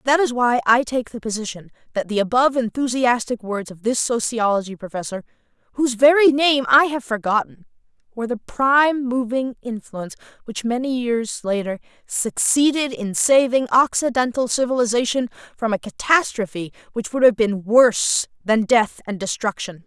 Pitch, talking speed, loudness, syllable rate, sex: 235 Hz, 145 wpm, -19 LUFS, 5.1 syllables/s, female